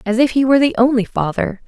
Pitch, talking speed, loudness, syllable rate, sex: 240 Hz, 250 wpm, -15 LUFS, 6.7 syllables/s, female